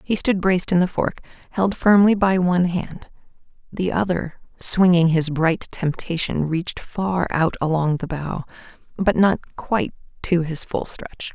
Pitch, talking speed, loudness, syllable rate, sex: 175 Hz, 155 wpm, -20 LUFS, 4.3 syllables/s, female